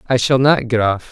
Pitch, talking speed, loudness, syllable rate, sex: 120 Hz, 270 wpm, -15 LUFS, 5.5 syllables/s, male